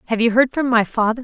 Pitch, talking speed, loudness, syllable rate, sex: 235 Hz, 290 wpm, -17 LUFS, 6.6 syllables/s, female